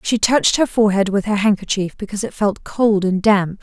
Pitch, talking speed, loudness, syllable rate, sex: 205 Hz, 215 wpm, -17 LUFS, 5.7 syllables/s, female